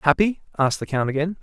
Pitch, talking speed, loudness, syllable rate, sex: 160 Hz, 210 wpm, -22 LUFS, 7.1 syllables/s, male